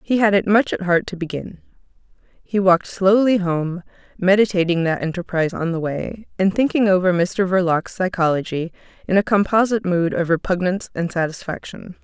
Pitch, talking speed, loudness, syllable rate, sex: 185 Hz, 160 wpm, -19 LUFS, 5.4 syllables/s, female